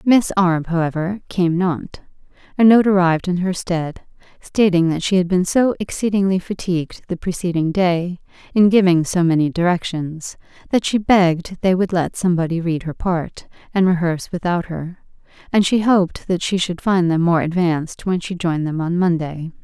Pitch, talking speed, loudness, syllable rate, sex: 175 Hz, 175 wpm, -18 LUFS, 5.1 syllables/s, female